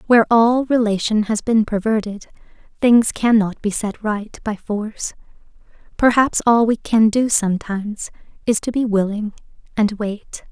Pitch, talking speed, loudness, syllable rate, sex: 220 Hz, 150 wpm, -18 LUFS, 4.6 syllables/s, female